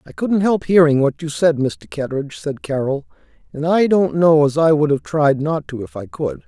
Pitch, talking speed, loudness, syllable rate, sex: 155 Hz, 230 wpm, -17 LUFS, 4.9 syllables/s, male